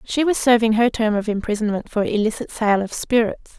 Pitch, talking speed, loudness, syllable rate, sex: 225 Hz, 200 wpm, -20 LUFS, 5.5 syllables/s, female